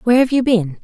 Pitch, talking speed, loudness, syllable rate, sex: 225 Hz, 285 wpm, -15 LUFS, 6.9 syllables/s, female